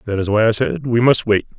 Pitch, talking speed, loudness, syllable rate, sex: 105 Hz, 300 wpm, -16 LUFS, 5.9 syllables/s, male